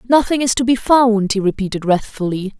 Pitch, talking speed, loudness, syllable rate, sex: 225 Hz, 185 wpm, -16 LUFS, 5.5 syllables/s, female